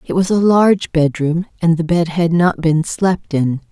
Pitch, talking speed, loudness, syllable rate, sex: 165 Hz, 210 wpm, -15 LUFS, 4.4 syllables/s, female